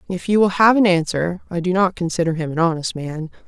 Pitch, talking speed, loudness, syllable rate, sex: 175 Hz, 240 wpm, -18 LUFS, 5.9 syllables/s, female